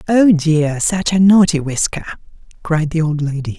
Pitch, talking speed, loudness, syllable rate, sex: 165 Hz, 165 wpm, -15 LUFS, 4.6 syllables/s, male